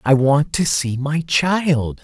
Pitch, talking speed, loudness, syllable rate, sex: 145 Hz, 175 wpm, -18 LUFS, 3.1 syllables/s, male